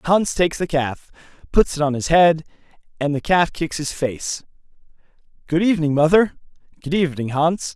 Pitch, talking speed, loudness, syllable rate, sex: 155 Hz, 160 wpm, -19 LUFS, 5.1 syllables/s, male